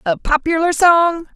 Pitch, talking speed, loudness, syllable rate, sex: 320 Hz, 130 wpm, -15 LUFS, 4.2 syllables/s, female